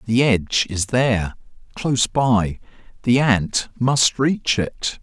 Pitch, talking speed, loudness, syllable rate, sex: 115 Hz, 130 wpm, -19 LUFS, 3.6 syllables/s, male